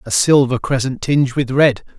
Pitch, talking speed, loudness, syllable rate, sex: 130 Hz, 180 wpm, -15 LUFS, 5.1 syllables/s, male